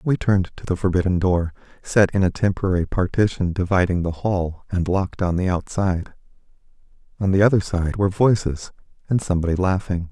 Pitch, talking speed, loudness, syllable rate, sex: 95 Hz, 165 wpm, -21 LUFS, 5.8 syllables/s, male